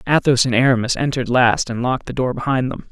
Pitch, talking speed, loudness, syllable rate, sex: 125 Hz, 225 wpm, -18 LUFS, 6.6 syllables/s, male